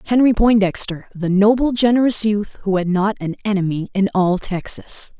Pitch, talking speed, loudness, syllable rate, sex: 205 Hz, 150 wpm, -18 LUFS, 4.9 syllables/s, female